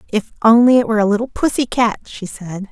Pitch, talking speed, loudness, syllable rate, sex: 220 Hz, 220 wpm, -15 LUFS, 5.8 syllables/s, female